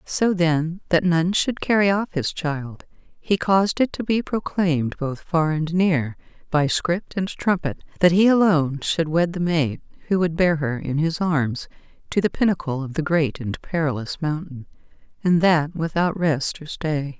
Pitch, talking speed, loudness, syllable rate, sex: 165 Hz, 180 wpm, -22 LUFS, 4.4 syllables/s, female